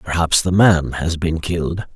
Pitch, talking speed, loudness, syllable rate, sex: 85 Hz, 185 wpm, -17 LUFS, 4.4 syllables/s, male